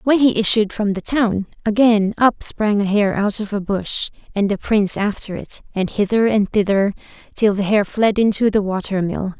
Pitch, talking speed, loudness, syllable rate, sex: 205 Hz, 205 wpm, -18 LUFS, 4.9 syllables/s, female